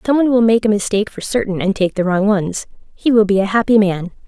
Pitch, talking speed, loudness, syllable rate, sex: 205 Hz, 255 wpm, -16 LUFS, 6.5 syllables/s, female